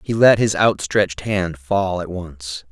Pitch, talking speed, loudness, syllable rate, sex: 95 Hz, 175 wpm, -19 LUFS, 3.9 syllables/s, male